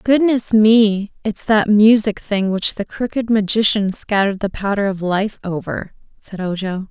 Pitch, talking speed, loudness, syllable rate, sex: 205 Hz, 155 wpm, -17 LUFS, 4.4 syllables/s, female